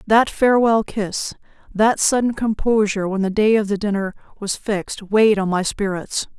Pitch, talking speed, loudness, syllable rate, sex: 210 Hz, 170 wpm, -19 LUFS, 5.0 syllables/s, female